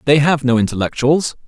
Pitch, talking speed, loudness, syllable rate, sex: 135 Hz, 160 wpm, -16 LUFS, 5.6 syllables/s, male